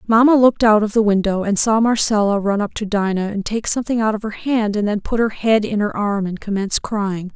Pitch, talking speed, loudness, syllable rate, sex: 210 Hz, 255 wpm, -18 LUFS, 5.7 syllables/s, female